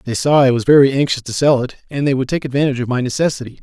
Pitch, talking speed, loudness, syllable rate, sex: 135 Hz, 280 wpm, -16 LUFS, 7.4 syllables/s, male